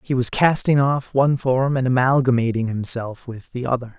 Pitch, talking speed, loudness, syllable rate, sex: 130 Hz, 180 wpm, -19 LUFS, 5.1 syllables/s, male